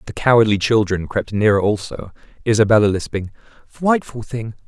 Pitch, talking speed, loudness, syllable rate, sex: 110 Hz, 115 wpm, -18 LUFS, 5.4 syllables/s, male